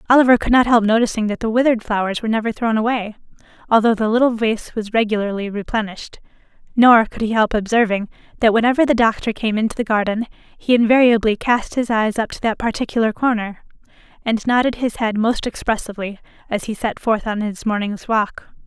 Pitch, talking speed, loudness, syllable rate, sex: 225 Hz, 185 wpm, -18 LUFS, 6.0 syllables/s, female